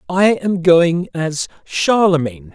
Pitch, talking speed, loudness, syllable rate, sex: 165 Hz, 120 wpm, -16 LUFS, 3.8 syllables/s, male